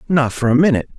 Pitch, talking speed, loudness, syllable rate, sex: 140 Hz, 245 wpm, -16 LUFS, 8.0 syllables/s, male